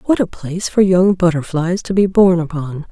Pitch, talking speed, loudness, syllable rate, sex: 180 Hz, 205 wpm, -15 LUFS, 5.2 syllables/s, female